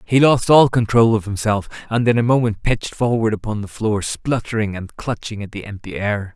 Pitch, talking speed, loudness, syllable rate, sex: 110 Hz, 210 wpm, -18 LUFS, 5.3 syllables/s, male